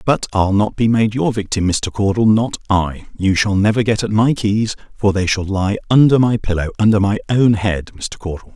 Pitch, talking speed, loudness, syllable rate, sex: 105 Hz, 210 wpm, -16 LUFS, 5.0 syllables/s, male